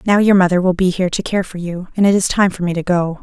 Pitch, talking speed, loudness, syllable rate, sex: 185 Hz, 335 wpm, -16 LUFS, 6.6 syllables/s, female